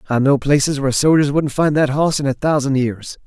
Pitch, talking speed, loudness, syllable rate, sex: 140 Hz, 240 wpm, -16 LUFS, 5.7 syllables/s, male